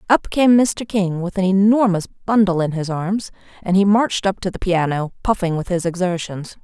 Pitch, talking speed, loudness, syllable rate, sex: 190 Hz, 200 wpm, -18 LUFS, 5.2 syllables/s, female